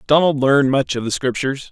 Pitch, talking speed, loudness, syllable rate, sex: 130 Hz, 210 wpm, -17 LUFS, 6.4 syllables/s, male